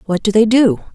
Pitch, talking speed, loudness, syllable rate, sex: 210 Hz, 255 wpm, -13 LUFS, 5.5 syllables/s, female